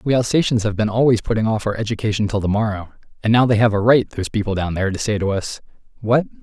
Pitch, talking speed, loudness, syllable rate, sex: 110 Hz, 250 wpm, -19 LUFS, 6.9 syllables/s, male